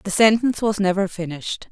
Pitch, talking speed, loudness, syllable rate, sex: 200 Hz, 175 wpm, -20 LUFS, 6.0 syllables/s, female